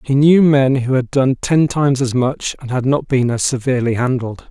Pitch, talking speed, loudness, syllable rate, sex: 130 Hz, 225 wpm, -16 LUFS, 5.0 syllables/s, male